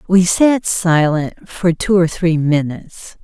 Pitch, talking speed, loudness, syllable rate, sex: 175 Hz, 150 wpm, -15 LUFS, 3.6 syllables/s, female